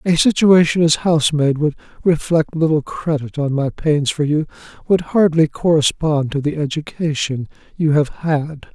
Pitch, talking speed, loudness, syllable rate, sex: 155 Hz, 145 wpm, -17 LUFS, 4.6 syllables/s, male